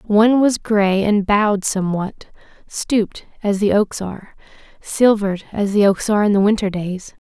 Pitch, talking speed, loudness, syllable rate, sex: 205 Hz, 165 wpm, -17 LUFS, 5.1 syllables/s, female